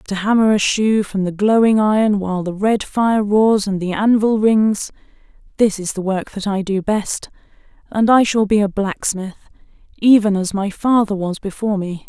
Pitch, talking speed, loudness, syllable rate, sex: 205 Hz, 185 wpm, -17 LUFS, 4.8 syllables/s, female